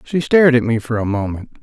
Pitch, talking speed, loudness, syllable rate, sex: 125 Hz, 260 wpm, -16 LUFS, 6.3 syllables/s, male